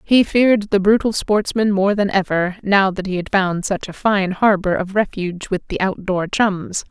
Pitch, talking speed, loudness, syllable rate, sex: 195 Hz, 200 wpm, -18 LUFS, 4.6 syllables/s, female